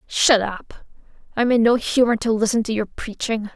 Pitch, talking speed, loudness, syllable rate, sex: 225 Hz, 185 wpm, -20 LUFS, 4.9 syllables/s, female